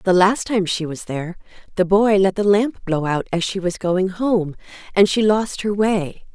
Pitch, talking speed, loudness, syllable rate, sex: 190 Hz, 215 wpm, -19 LUFS, 4.4 syllables/s, female